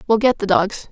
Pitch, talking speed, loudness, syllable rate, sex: 215 Hz, 260 wpm, -17 LUFS, 5.4 syllables/s, female